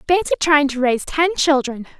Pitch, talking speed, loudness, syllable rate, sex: 290 Hz, 180 wpm, -17 LUFS, 5.6 syllables/s, female